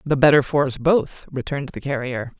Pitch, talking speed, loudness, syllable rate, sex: 140 Hz, 200 wpm, -20 LUFS, 5.4 syllables/s, female